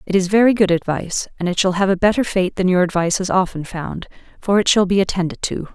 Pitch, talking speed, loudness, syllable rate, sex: 185 Hz, 250 wpm, -18 LUFS, 6.4 syllables/s, female